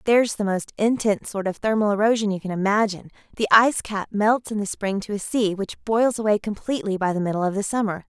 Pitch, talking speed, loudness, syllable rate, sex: 210 Hz, 220 wpm, -22 LUFS, 6.4 syllables/s, female